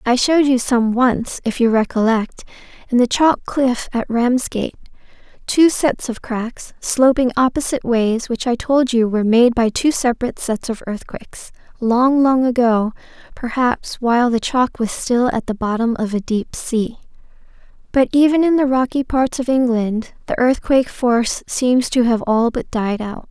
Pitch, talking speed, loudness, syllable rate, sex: 245 Hz, 170 wpm, -17 LUFS, 4.6 syllables/s, female